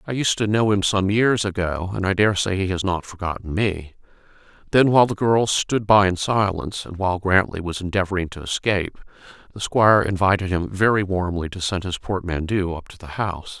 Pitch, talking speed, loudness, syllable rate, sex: 95 Hz, 200 wpm, -21 LUFS, 5.6 syllables/s, male